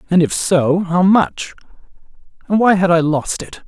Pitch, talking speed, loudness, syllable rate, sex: 175 Hz, 180 wpm, -15 LUFS, 4.4 syllables/s, male